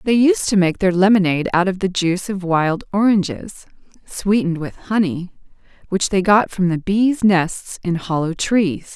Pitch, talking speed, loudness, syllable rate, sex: 190 Hz, 175 wpm, -18 LUFS, 4.7 syllables/s, female